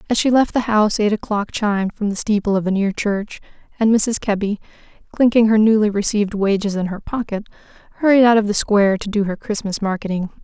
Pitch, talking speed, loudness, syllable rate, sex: 210 Hz, 205 wpm, -18 LUFS, 6.0 syllables/s, female